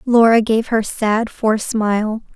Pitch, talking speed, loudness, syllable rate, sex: 220 Hz, 155 wpm, -17 LUFS, 4.2 syllables/s, female